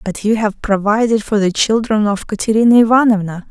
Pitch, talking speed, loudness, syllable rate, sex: 215 Hz, 170 wpm, -14 LUFS, 5.6 syllables/s, female